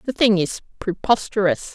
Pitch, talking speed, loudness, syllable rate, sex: 205 Hz, 135 wpm, -20 LUFS, 4.9 syllables/s, female